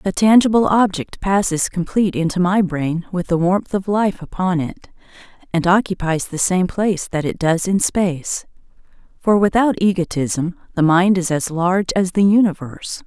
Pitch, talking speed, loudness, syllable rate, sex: 185 Hz, 165 wpm, -18 LUFS, 4.9 syllables/s, female